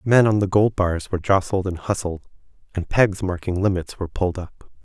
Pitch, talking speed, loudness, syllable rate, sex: 95 Hz, 200 wpm, -22 LUFS, 5.5 syllables/s, male